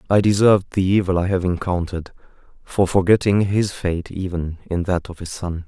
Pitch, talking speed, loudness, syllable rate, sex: 90 Hz, 180 wpm, -20 LUFS, 5.4 syllables/s, male